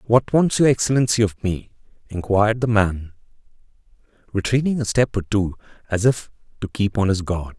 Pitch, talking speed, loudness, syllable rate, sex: 105 Hz, 165 wpm, -20 LUFS, 5.4 syllables/s, male